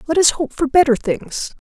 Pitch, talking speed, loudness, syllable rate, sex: 290 Hz, 220 wpm, -17 LUFS, 5.0 syllables/s, female